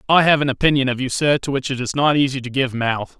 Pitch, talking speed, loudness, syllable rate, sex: 135 Hz, 300 wpm, -18 LUFS, 6.3 syllables/s, male